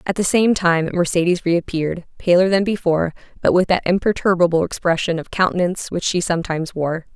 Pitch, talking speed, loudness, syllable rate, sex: 175 Hz, 170 wpm, -18 LUFS, 5.9 syllables/s, female